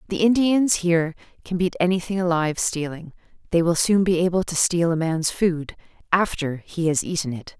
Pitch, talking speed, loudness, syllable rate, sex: 175 Hz, 180 wpm, -22 LUFS, 5.3 syllables/s, female